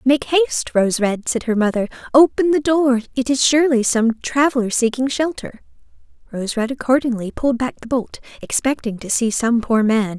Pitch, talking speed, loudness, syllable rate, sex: 245 Hz, 175 wpm, -18 LUFS, 5.2 syllables/s, female